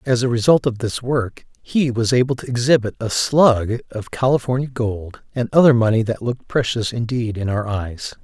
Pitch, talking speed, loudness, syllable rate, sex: 120 Hz, 190 wpm, -19 LUFS, 5.0 syllables/s, male